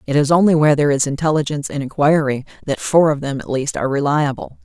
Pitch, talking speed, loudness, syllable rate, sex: 145 Hz, 220 wpm, -17 LUFS, 6.8 syllables/s, female